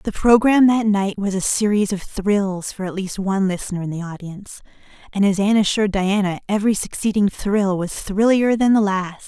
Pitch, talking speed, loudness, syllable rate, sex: 200 Hz, 195 wpm, -19 LUFS, 5.4 syllables/s, female